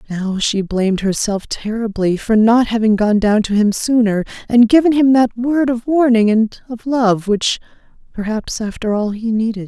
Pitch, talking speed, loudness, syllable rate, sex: 220 Hz, 180 wpm, -15 LUFS, 4.6 syllables/s, female